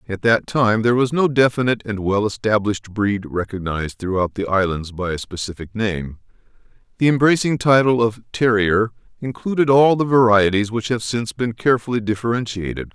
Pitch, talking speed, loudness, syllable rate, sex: 110 Hz, 160 wpm, -19 LUFS, 5.5 syllables/s, male